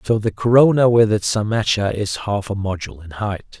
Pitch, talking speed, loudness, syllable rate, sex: 105 Hz, 200 wpm, -18 LUFS, 5.2 syllables/s, male